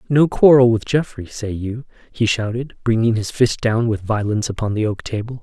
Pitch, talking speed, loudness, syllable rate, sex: 115 Hz, 200 wpm, -18 LUFS, 5.3 syllables/s, male